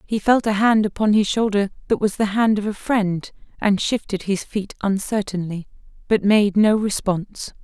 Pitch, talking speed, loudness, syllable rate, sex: 205 Hz, 180 wpm, -20 LUFS, 4.8 syllables/s, female